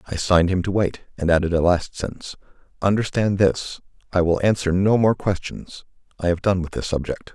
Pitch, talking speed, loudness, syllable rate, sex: 90 Hz, 190 wpm, -21 LUFS, 5.5 syllables/s, male